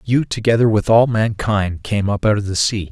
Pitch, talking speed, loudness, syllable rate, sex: 105 Hz, 225 wpm, -17 LUFS, 5.0 syllables/s, male